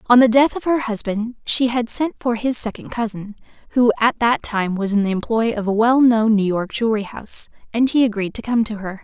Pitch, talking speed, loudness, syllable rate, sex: 225 Hz, 235 wpm, -19 LUFS, 5.4 syllables/s, female